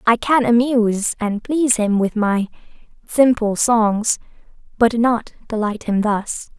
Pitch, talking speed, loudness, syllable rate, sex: 225 Hz, 135 wpm, -18 LUFS, 3.9 syllables/s, female